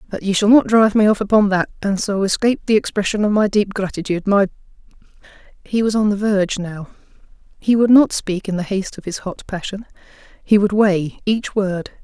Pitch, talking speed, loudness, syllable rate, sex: 200 Hz, 205 wpm, -17 LUFS, 5.1 syllables/s, female